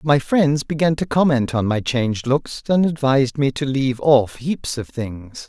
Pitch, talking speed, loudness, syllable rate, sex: 135 Hz, 195 wpm, -19 LUFS, 4.5 syllables/s, male